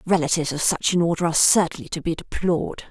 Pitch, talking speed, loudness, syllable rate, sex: 165 Hz, 205 wpm, -21 LUFS, 6.9 syllables/s, female